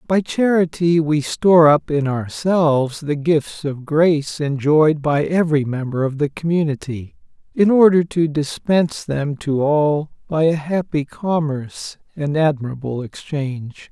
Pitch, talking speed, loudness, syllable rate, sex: 150 Hz, 140 wpm, -18 LUFS, 4.3 syllables/s, male